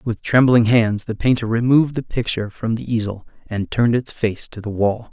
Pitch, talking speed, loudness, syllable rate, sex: 115 Hz, 210 wpm, -19 LUFS, 5.3 syllables/s, male